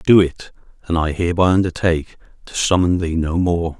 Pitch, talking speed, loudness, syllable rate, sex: 85 Hz, 175 wpm, -18 LUFS, 5.6 syllables/s, male